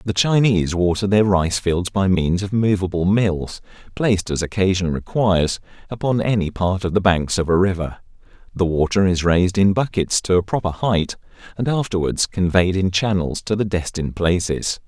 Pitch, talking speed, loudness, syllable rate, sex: 95 Hz, 175 wpm, -19 LUFS, 5.1 syllables/s, male